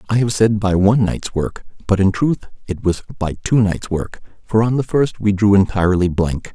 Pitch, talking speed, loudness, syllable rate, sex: 100 Hz, 220 wpm, -17 LUFS, 5.1 syllables/s, male